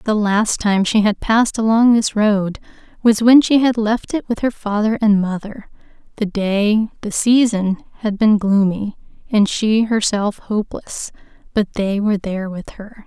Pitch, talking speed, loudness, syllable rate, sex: 210 Hz, 165 wpm, -17 LUFS, 4.4 syllables/s, female